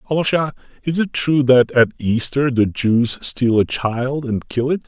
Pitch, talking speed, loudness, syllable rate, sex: 130 Hz, 185 wpm, -18 LUFS, 4.3 syllables/s, male